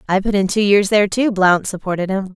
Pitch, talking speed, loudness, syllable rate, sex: 195 Hz, 255 wpm, -16 LUFS, 6.0 syllables/s, female